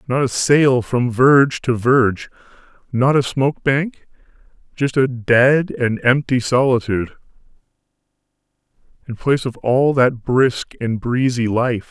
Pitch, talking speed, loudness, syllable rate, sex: 125 Hz, 125 wpm, -17 LUFS, 4.1 syllables/s, male